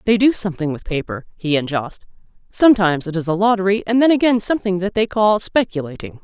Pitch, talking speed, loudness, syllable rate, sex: 195 Hz, 200 wpm, -17 LUFS, 6.3 syllables/s, female